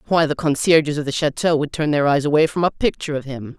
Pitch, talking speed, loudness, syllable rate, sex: 150 Hz, 265 wpm, -19 LUFS, 6.5 syllables/s, female